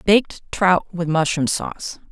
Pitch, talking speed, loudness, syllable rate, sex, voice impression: 180 Hz, 140 wpm, -20 LUFS, 4.4 syllables/s, female, feminine, adult-like, slightly cool, slightly intellectual, calm